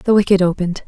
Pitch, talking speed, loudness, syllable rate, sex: 185 Hz, 205 wpm, -16 LUFS, 7.3 syllables/s, female